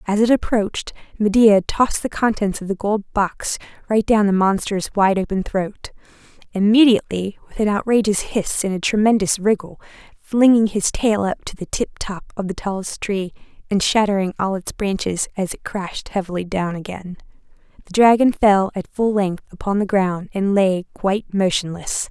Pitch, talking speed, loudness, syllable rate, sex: 200 Hz, 165 wpm, -19 LUFS, 5.1 syllables/s, female